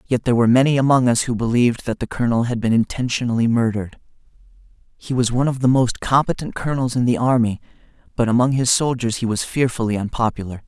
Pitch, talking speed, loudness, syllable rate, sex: 120 Hz, 190 wpm, -19 LUFS, 6.8 syllables/s, male